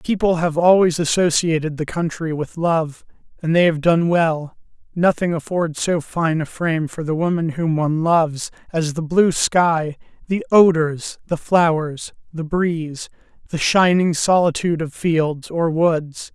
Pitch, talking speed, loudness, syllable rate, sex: 165 Hz, 155 wpm, -19 LUFS, 4.3 syllables/s, male